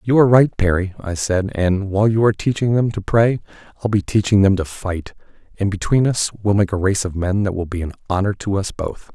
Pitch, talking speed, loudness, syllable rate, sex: 100 Hz, 245 wpm, -18 LUFS, 5.7 syllables/s, male